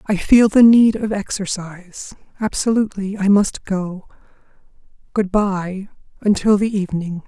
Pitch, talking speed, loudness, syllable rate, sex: 200 Hz, 115 wpm, -17 LUFS, 4.5 syllables/s, female